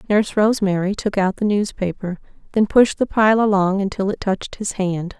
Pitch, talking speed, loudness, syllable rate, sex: 200 Hz, 185 wpm, -19 LUFS, 5.4 syllables/s, female